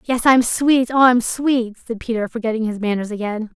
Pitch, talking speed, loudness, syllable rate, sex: 230 Hz, 220 wpm, -18 LUFS, 5.5 syllables/s, female